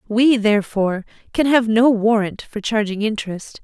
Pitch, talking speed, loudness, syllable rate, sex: 220 Hz, 150 wpm, -18 LUFS, 5.1 syllables/s, female